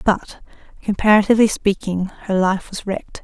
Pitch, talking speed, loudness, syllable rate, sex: 200 Hz, 130 wpm, -18 LUFS, 5.1 syllables/s, female